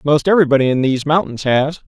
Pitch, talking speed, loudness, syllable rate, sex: 145 Hz, 185 wpm, -15 LUFS, 6.9 syllables/s, male